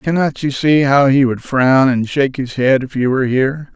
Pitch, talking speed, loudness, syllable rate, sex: 135 Hz, 240 wpm, -14 LUFS, 5.2 syllables/s, male